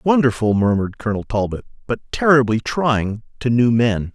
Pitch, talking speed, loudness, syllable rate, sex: 120 Hz, 145 wpm, -18 LUFS, 5.3 syllables/s, male